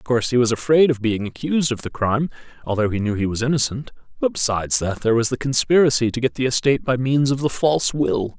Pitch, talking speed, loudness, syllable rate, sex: 125 Hz, 245 wpm, -20 LUFS, 6.6 syllables/s, male